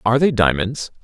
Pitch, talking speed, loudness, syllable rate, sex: 115 Hz, 175 wpm, -18 LUFS, 5.9 syllables/s, male